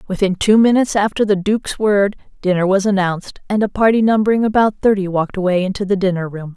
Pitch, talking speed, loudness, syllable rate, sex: 200 Hz, 200 wpm, -16 LUFS, 6.4 syllables/s, female